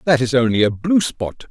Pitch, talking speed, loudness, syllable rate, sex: 130 Hz, 240 wpm, -17 LUFS, 5.2 syllables/s, male